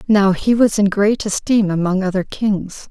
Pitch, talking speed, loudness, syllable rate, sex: 200 Hz, 185 wpm, -16 LUFS, 4.4 syllables/s, female